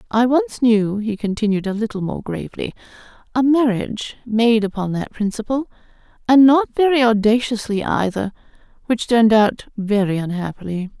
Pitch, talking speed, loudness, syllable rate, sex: 225 Hz, 135 wpm, -18 LUFS, 5.1 syllables/s, female